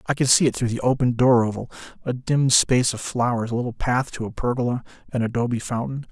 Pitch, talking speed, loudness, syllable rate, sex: 125 Hz, 215 wpm, -22 LUFS, 6.4 syllables/s, male